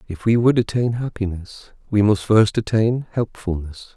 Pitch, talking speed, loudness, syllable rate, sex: 105 Hz, 150 wpm, -20 LUFS, 4.6 syllables/s, male